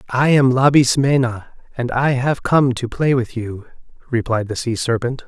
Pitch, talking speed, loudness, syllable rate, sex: 125 Hz, 170 wpm, -17 LUFS, 4.5 syllables/s, male